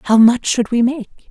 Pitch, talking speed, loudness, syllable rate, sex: 240 Hz, 230 wpm, -15 LUFS, 4.6 syllables/s, female